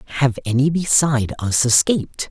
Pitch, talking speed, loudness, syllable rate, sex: 130 Hz, 130 wpm, -17 LUFS, 5.7 syllables/s, male